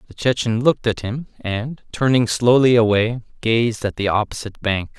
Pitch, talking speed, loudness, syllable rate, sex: 115 Hz, 170 wpm, -19 LUFS, 5.0 syllables/s, male